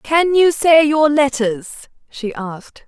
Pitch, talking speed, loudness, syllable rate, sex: 280 Hz, 145 wpm, -14 LUFS, 3.7 syllables/s, female